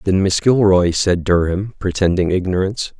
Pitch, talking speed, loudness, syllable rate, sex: 95 Hz, 140 wpm, -16 LUFS, 5.0 syllables/s, male